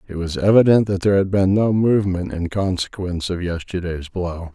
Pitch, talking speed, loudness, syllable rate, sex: 95 Hz, 185 wpm, -19 LUFS, 5.5 syllables/s, male